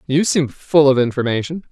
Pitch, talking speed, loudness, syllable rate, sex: 140 Hz, 175 wpm, -16 LUFS, 5.3 syllables/s, male